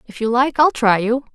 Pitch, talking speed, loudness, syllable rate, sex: 240 Hz, 270 wpm, -17 LUFS, 5.3 syllables/s, female